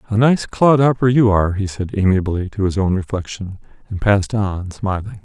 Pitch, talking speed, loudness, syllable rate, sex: 100 Hz, 185 wpm, -17 LUFS, 5.3 syllables/s, male